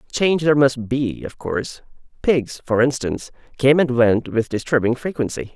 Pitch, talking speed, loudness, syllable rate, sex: 130 Hz, 160 wpm, -19 LUFS, 5.2 syllables/s, male